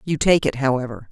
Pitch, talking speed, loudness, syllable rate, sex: 135 Hz, 215 wpm, -19 LUFS, 5.9 syllables/s, female